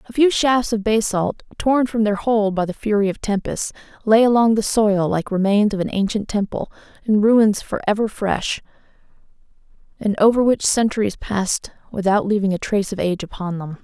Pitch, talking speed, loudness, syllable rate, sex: 210 Hz, 180 wpm, -19 LUFS, 5.3 syllables/s, female